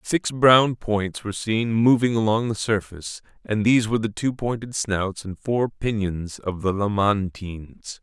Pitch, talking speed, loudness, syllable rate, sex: 105 Hz, 165 wpm, -22 LUFS, 4.4 syllables/s, male